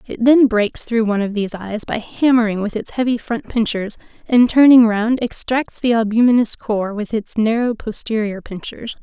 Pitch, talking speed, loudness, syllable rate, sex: 225 Hz, 180 wpm, -17 LUFS, 4.9 syllables/s, female